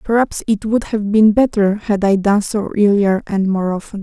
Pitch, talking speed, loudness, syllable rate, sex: 205 Hz, 210 wpm, -16 LUFS, 4.6 syllables/s, female